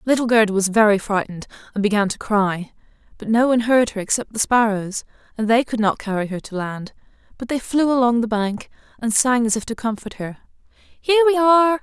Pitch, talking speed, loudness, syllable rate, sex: 230 Hz, 210 wpm, -19 LUFS, 5.8 syllables/s, female